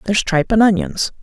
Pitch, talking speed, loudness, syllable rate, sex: 200 Hz, 195 wpm, -16 LUFS, 6.9 syllables/s, female